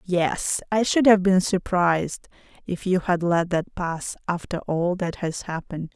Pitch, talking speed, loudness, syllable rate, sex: 180 Hz, 170 wpm, -23 LUFS, 4.4 syllables/s, female